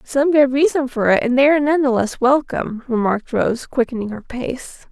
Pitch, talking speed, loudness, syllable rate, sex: 260 Hz, 210 wpm, -18 LUFS, 5.3 syllables/s, female